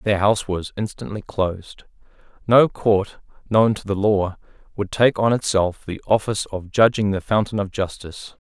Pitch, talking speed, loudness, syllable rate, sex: 100 Hz, 165 wpm, -20 LUFS, 4.9 syllables/s, male